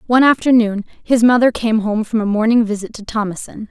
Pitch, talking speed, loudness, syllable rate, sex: 225 Hz, 195 wpm, -15 LUFS, 5.8 syllables/s, female